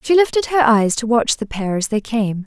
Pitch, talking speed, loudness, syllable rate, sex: 235 Hz, 265 wpm, -17 LUFS, 5.1 syllables/s, female